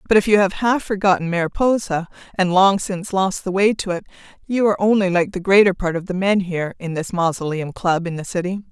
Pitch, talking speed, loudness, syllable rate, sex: 185 Hz, 225 wpm, -19 LUFS, 6.0 syllables/s, female